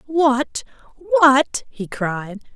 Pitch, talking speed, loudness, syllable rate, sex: 265 Hz, 95 wpm, -18 LUFS, 2.1 syllables/s, female